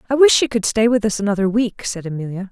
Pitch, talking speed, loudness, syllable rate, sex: 210 Hz, 260 wpm, -18 LUFS, 6.5 syllables/s, female